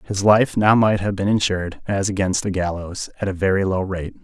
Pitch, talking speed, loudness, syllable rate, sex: 100 Hz, 225 wpm, -20 LUFS, 5.4 syllables/s, male